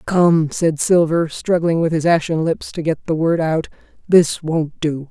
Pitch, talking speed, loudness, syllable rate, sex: 160 Hz, 190 wpm, -17 LUFS, 4.1 syllables/s, female